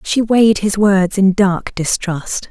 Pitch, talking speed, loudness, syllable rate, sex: 195 Hz, 165 wpm, -14 LUFS, 3.7 syllables/s, female